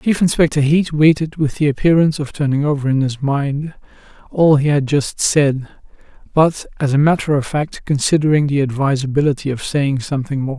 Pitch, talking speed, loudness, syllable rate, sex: 145 Hz, 175 wpm, -16 LUFS, 5.4 syllables/s, male